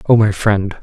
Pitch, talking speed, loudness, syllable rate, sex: 105 Hz, 220 wpm, -14 LUFS, 4.6 syllables/s, male